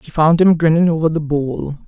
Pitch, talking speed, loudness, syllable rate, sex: 155 Hz, 225 wpm, -15 LUFS, 5.3 syllables/s, female